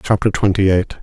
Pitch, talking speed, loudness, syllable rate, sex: 100 Hz, 175 wpm, -16 LUFS, 5.8 syllables/s, male